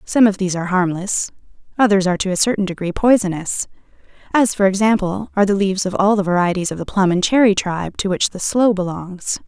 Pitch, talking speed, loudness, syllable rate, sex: 195 Hz, 210 wpm, -17 LUFS, 6.2 syllables/s, female